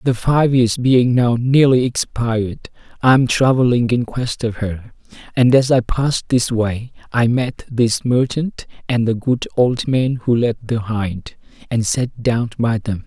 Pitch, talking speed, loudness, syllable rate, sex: 120 Hz, 175 wpm, -17 LUFS, 4.0 syllables/s, male